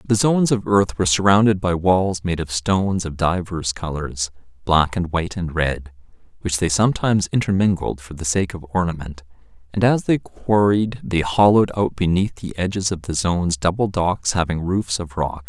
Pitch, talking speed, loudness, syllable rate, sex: 90 Hz, 180 wpm, -20 LUFS, 5.1 syllables/s, male